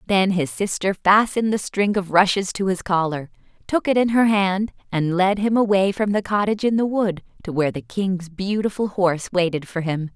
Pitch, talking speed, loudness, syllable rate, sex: 190 Hz, 205 wpm, -21 LUFS, 5.2 syllables/s, female